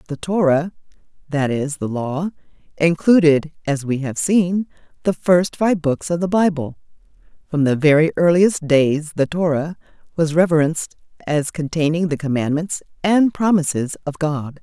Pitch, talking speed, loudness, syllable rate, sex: 160 Hz, 135 wpm, -18 LUFS, 4.6 syllables/s, female